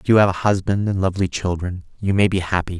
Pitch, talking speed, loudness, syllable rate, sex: 95 Hz, 260 wpm, -20 LUFS, 6.4 syllables/s, male